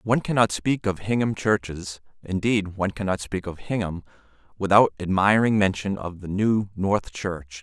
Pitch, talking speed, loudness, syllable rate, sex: 100 Hz, 140 wpm, -24 LUFS, 4.8 syllables/s, male